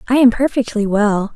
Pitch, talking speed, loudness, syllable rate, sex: 230 Hz, 175 wpm, -15 LUFS, 5.0 syllables/s, female